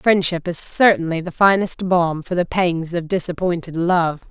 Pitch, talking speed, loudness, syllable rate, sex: 175 Hz, 165 wpm, -18 LUFS, 4.5 syllables/s, female